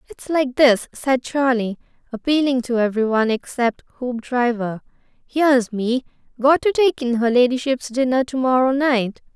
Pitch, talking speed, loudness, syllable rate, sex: 250 Hz, 140 wpm, -19 LUFS, 4.7 syllables/s, female